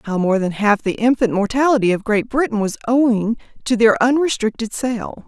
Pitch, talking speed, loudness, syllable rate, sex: 225 Hz, 180 wpm, -18 LUFS, 5.3 syllables/s, female